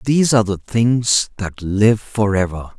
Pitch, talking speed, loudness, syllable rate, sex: 105 Hz, 170 wpm, -17 LUFS, 4.4 syllables/s, male